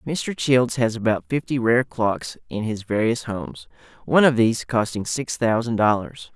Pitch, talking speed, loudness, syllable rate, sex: 115 Hz, 170 wpm, -22 LUFS, 4.8 syllables/s, male